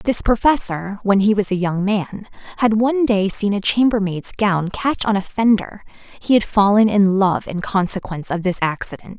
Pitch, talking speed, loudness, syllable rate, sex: 205 Hz, 190 wpm, -18 LUFS, 4.9 syllables/s, female